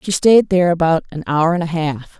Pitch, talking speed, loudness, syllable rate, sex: 170 Hz, 245 wpm, -16 LUFS, 5.6 syllables/s, female